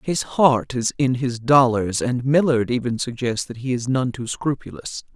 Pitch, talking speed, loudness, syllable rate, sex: 125 Hz, 185 wpm, -21 LUFS, 4.5 syllables/s, female